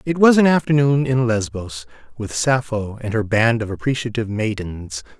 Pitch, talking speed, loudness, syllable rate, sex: 115 Hz, 150 wpm, -19 LUFS, 5.0 syllables/s, male